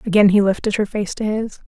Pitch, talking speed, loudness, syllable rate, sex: 205 Hz, 245 wpm, -18 LUFS, 5.9 syllables/s, female